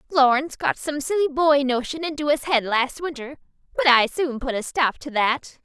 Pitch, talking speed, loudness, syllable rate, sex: 275 Hz, 200 wpm, -22 LUFS, 5.0 syllables/s, female